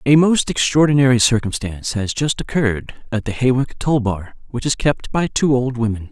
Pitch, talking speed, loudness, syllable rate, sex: 125 Hz, 185 wpm, -18 LUFS, 5.2 syllables/s, male